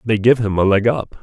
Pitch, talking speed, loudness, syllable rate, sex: 110 Hz, 295 wpm, -16 LUFS, 5.4 syllables/s, male